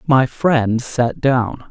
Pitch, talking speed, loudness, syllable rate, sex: 125 Hz, 140 wpm, -17 LUFS, 2.6 syllables/s, male